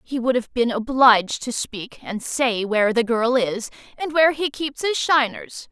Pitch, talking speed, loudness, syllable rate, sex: 245 Hz, 200 wpm, -20 LUFS, 4.5 syllables/s, female